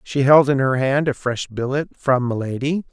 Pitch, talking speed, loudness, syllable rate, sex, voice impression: 135 Hz, 205 wpm, -19 LUFS, 4.7 syllables/s, male, masculine, adult-like, slightly cool, slightly intellectual, slightly refreshing